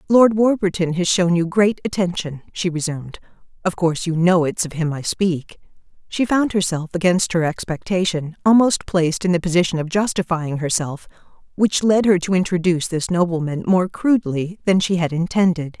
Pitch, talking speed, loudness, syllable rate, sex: 175 Hz, 170 wpm, -19 LUFS, 5.3 syllables/s, female